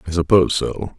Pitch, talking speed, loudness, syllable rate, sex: 85 Hz, 185 wpm, -18 LUFS, 6.3 syllables/s, male